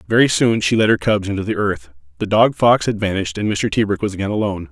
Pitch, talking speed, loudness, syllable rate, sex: 100 Hz, 255 wpm, -17 LUFS, 6.6 syllables/s, male